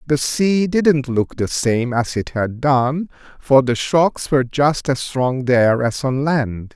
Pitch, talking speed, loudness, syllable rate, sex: 135 Hz, 195 wpm, -18 LUFS, 3.8 syllables/s, male